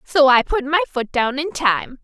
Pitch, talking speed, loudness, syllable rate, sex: 280 Hz, 235 wpm, -18 LUFS, 4.3 syllables/s, female